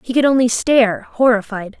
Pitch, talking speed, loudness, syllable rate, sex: 235 Hz, 165 wpm, -15 LUFS, 5.3 syllables/s, female